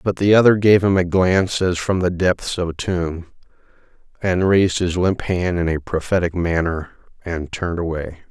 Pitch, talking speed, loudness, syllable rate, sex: 90 Hz, 190 wpm, -19 LUFS, 5.1 syllables/s, male